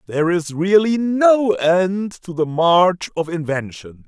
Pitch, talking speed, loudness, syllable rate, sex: 180 Hz, 145 wpm, -17 LUFS, 3.7 syllables/s, male